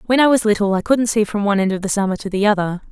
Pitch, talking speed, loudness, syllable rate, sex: 205 Hz, 330 wpm, -17 LUFS, 7.5 syllables/s, female